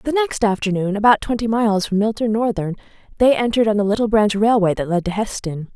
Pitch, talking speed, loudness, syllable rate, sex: 205 Hz, 210 wpm, -18 LUFS, 6.4 syllables/s, female